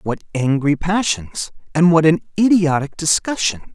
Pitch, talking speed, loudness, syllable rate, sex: 160 Hz, 110 wpm, -17 LUFS, 4.4 syllables/s, male